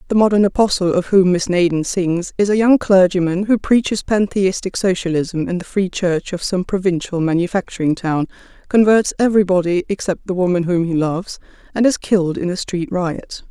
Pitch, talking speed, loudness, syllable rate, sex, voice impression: 185 Hz, 180 wpm, -17 LUFS, 5.3 syllables/s, female, feminine, adult-like, slightly muffled, sincere, slightly calm, reassuring, slightly sweet